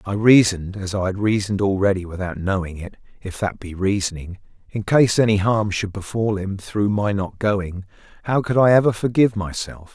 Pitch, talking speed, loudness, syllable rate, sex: 100 Hz, 175 wpm, -20 LUFS, 5.4 syllables/s, male